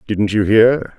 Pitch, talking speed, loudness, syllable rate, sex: 110 Hz, 185 wpm, -14 LUFS, 3.5 syllables/s, male